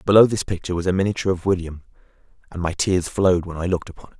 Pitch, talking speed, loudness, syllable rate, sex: 90 Hz, 245 wpm, -21 LUFS, 8.1 syllables/s, male